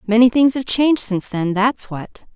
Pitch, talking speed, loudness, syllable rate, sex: 225 Hz, 205 wpm, -17 LUFS, 5.1 syllables/s, female